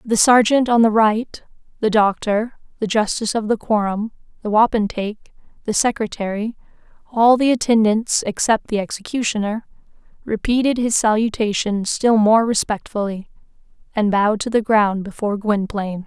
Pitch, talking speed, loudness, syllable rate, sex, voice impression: 215 Hz, 130 wpm, -18 LUFS, 5.2 syllables/s, female, slightly feminine, slightly adult-like, intellectual, slightly calm